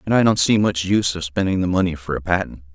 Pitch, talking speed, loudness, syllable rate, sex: 90 Hz, 285 wpm, -19 LUFS, 6.7 syllables/s, male